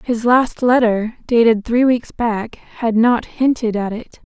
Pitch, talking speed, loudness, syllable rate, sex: 235 Hz, 165 wpm, -16 LUFS, 3.9 syllables/s, female